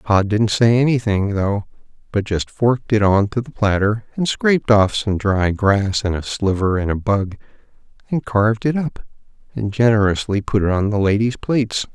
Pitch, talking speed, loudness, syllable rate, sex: 105 Hz, 185 wpm, -18 LUFS, 4.9 syllables/s, male